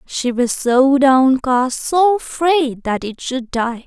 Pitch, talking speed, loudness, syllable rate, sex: 265 Hz, 155 wpm, -16 LUFS, 3.2 syllables/s, female